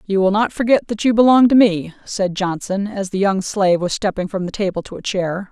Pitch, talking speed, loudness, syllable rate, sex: 200 Hz, 250 wpm, -17 LUFS, 5.5 syllables/s, female